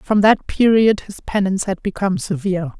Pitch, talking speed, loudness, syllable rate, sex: 195 Hz, 170 wpm, -18 LUFS, 5.5 syllables/s, female